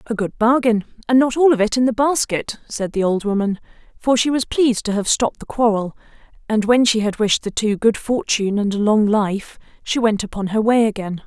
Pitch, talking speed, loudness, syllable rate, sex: 220 Hz, 230 wpm, -18 LUFS, 5.5 syllables/s, female